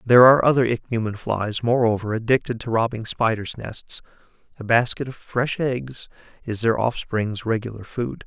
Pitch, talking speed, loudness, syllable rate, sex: 115 Hz, 150 wpm, -22 LUFS, 5.0 syllables/s, male